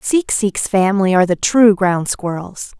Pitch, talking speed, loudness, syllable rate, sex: 200 Hz, 170 wpm, -15 LUFS, 4.5 syllables/s, female